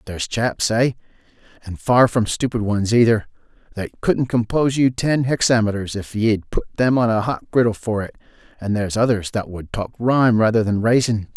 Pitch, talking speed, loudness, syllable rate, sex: 110 Hz, 190 wpm, -19 LUFS, 5.4 syllables/s, male